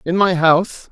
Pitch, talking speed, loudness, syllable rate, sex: 175 Hz, 195 wpm, -15 LUFS, 5.1 syllables/s, male